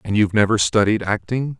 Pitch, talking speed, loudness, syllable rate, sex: 105 Hz, 190 wpm, -18 LUFS, 5.5 syllables/s, male